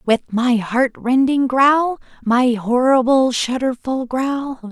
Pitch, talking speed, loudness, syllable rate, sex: 255 Hz, 100 wpm, -17 LUFS, 3.3 syllables/s, female